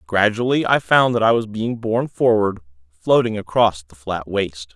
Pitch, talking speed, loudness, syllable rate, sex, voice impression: 105 Hz, 175 wpm, -19 LUFS, 4.9 syllables/s, male, masculine, adult-like, soft, slightly muffled, slightly intellectual, sincere, slightly reassuring, slightly wild, kind, slightly modest